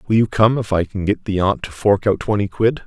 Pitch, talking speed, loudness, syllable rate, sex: 105 Hz, 295 wpm, -18 LUFS, 5.6 syllables/s, male